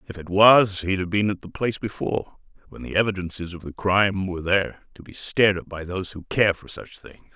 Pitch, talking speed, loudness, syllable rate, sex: 95 Hz, 235 wpm, -22 LUFS, 6.1 syllables/s, male